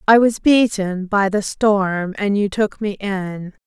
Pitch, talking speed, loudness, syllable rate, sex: 200 Hz, 180 wpm, -18 LUFS, 3.5 syllables/s, female